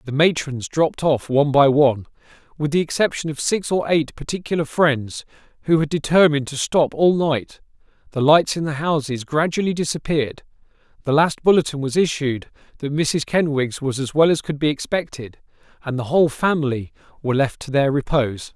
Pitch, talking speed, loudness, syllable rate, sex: 150 Hz, 175 wpm, -20 LUFS, 5.5 syllables/s, male